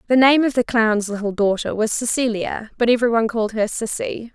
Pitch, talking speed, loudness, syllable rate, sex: 225 Hz, 205 wpm, -19 LUFS, 5.9 syllables/s, female